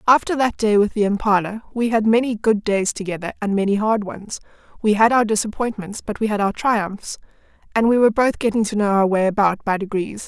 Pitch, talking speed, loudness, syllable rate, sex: 210 Hz, 215 wpm, -19 LUFS, 5.7 syllables/s, female